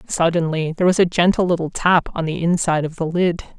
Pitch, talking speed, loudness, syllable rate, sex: 170 Hz, 215 wpm, -19 LUFS, 6.2 syllables/s, female